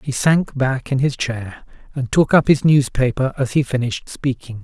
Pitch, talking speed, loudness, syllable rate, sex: 130 Hz, 195 wpm, -18 LUFS, 4.8 syllables/s, male